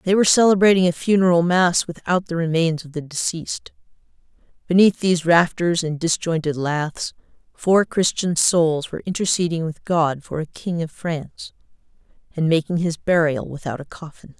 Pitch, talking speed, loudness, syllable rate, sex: 170 Hz, 155 wpm, -20 LUFS, 5.1 syllables/s, female